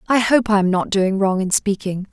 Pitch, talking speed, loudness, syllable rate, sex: 200 Hz, 255 wpm, -18 LUFS, 5.1 syllables/s, female